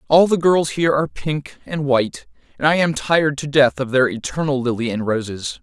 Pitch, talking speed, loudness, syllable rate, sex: 140 Hz, 215 wpm, -19 LUFS, 5.5 syllables/s, male